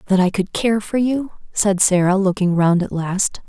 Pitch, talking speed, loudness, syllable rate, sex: 195 Hz, 205 wpm, -18 LUFS, 4.6 syllables/s, female